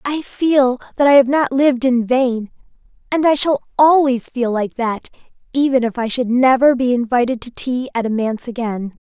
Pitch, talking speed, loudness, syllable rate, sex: 250 Hz, 195 wpm, -16 LUFS, 5.0 syllables/s, female